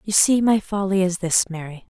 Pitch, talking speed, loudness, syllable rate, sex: 190 Hz, 210 wpm, -19 LUFS, 5.1 syllables/s, female